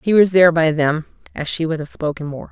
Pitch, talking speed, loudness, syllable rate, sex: 160 Hz, 260 wpm, -17 LUFS, 6.1 syllables/s, female